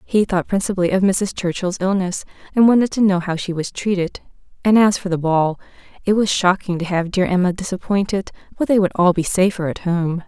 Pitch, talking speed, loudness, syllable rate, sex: 185 Hz, 210 wpm, -18 LUFS, 5.6 syllables/s, female